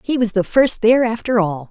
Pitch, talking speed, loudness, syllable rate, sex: 220 Hz, 245 wpm, -16 LUFS, 5.6 syllables/s, female